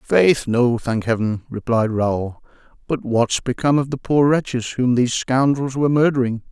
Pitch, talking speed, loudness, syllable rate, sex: 125 Hz, 175 wpm, -19 LUFS, 4.9 syllables/s, male